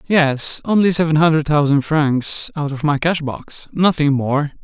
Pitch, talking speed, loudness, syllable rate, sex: 150 Hz, 155 wpm, -17 LUFS, 4.2 syllables/s, male